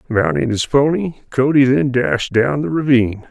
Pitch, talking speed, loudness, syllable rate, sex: 125 Hz, 165 wpm, -16 LUFS, 4.7 syllables/s, male